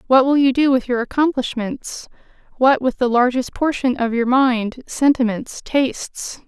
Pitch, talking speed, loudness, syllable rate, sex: 255 Hz, 140 wpm, -18 LUFS, 4.4 syllables/s, female